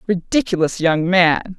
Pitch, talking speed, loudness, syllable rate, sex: 180 Hz, 115 wpm, -17 LUFS, 4.1 syllables/s, female